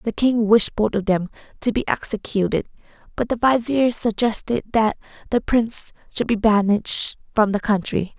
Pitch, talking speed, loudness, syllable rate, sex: 220 Hz, 160 wpm, -20 LUFS, 5.1 syllables/s, female